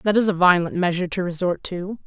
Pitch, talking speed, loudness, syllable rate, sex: 185 Hz, 230 wpm, -21 LUFS, 6.1 syllables/s, female